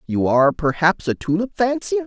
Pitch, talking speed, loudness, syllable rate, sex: 185 Hz, 175 wpm, -19 LUFS, 5.2 syllables/s, male